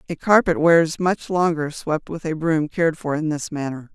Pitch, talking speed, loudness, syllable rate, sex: 160 Hz, 215 wpm, -20 LUFS, 4.8 syllables/s, female